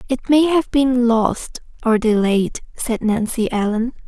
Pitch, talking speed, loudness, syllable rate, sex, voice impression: 235 Hz, 145 wpm, -18 LUFS, 3.8 syllables/s, female, very feminine, slightly young, slightly adult-like, slightly tensed, slightly weak, bright, very soft, slightly muffled, slightly halting, very cute, intellectual, slightly refreshing, sincere, very calm, very friendly, very reassuring, unique, very elegant, sweet, slightly lively, very kind, slightly modest